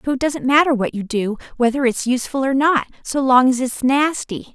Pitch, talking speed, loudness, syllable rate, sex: 260 Hz, 225 wpm, -18 LUFS, 5.5 syllables/s, female